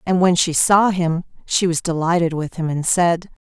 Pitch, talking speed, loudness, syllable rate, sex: 170 Hz, 210 wpm, -18 LUFS, 4.6 syllables/s, female